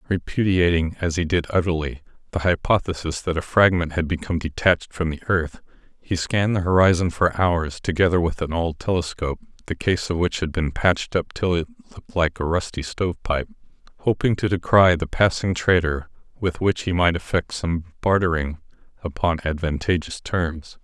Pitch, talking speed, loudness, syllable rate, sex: 85 Hz, 170 wpm, -22 LUFS, 5.3 syllables/s, male